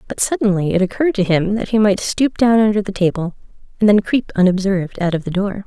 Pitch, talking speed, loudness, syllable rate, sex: 200 Hz, 235 wpm, -17 LUFS, 6.2 syllables/s, female